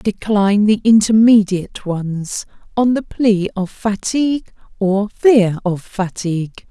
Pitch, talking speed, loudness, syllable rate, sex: 205 Hz, 115 wpm, -16 LUFS, 4.0 syllables/s, female